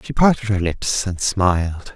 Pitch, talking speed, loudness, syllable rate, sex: 100 Hz, 185 wpm, -19 LUFS, 4.3 syllables/s, male